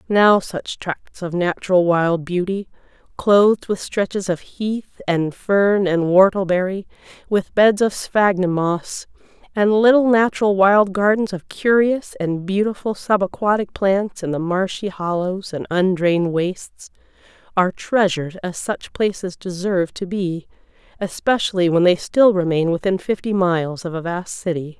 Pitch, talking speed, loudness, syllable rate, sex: 190 Hz, 145 wpm, -19 LUFS, 4.4 syllables/s, female